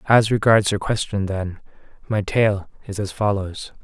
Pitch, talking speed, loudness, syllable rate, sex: 100 Hz, 155 wpm, -21 LUFS, 4.4 syllables/s, male